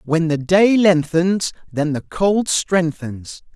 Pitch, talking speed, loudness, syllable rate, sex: 170 Hz, 135 wpm, -17 LUFS, 3.1 syllables/s, male